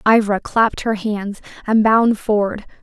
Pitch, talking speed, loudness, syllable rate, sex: 215 Hz, 150 wpm, -17 LUFS, 4.7 syllables/s, female